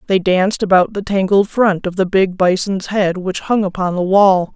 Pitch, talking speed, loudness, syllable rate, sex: 190 Hz, 210 wpm, -15 LUFS, 4.8 syllables/s, female